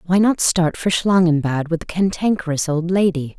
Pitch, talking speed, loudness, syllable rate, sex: 175 Hz, 175 wpm, -18 LUFS, 5.0 syllables/s, female